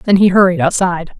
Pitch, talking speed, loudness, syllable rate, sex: 180 Hz, 200 wpm, -12 LUFS, 6.4 syllables/s, female